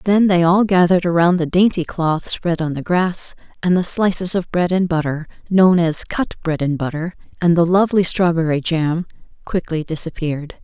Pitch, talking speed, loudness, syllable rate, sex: 170 Hz, 180 wpm, -17 LUFS, 5.1 syllables/s, female